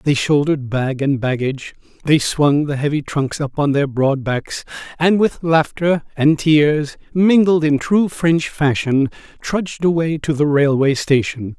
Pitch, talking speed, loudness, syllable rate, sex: 150 Hz, 160 wpm, -17 LUFS, 4.2 syllables/s, male